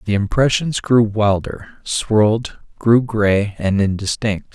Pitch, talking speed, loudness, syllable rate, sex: 110 Hz, 120 wpm, -17 LUFS, 3.7 syllables/s, male